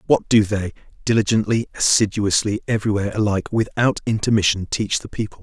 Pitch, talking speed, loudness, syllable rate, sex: 105 Hz, 135 wpm, -20 LUFS, 6.2 syllables/s, male